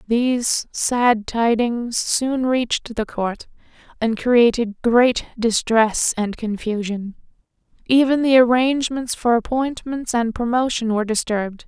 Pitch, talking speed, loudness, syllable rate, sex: 235 Hz, 115 wpm, -19 LUFS, 4.0 syllables/s, female